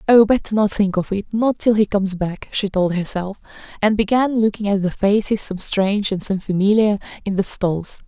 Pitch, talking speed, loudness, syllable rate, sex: 200 Hz, 200 wpm, -19 LUFS, 5.3 syllables/s, female